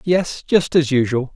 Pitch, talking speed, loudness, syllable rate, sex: 150 Hz, 175 wpm, -18 LUFS, 4.1 syllables/s, male